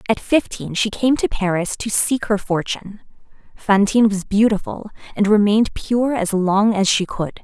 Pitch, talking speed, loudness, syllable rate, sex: 205 Hz, 170 wpm, -18 LUFS, 4.8 syllables/s, female